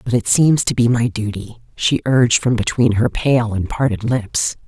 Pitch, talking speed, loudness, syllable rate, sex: 115 Hz, 205 wpm, -17 LUFS, 4.6 syllables/s, female